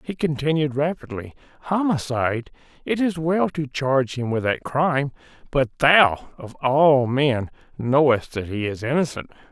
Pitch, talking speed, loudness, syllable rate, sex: 140 Hz, 140 wpm, -21 LUFS, 4.6 syllables/s, male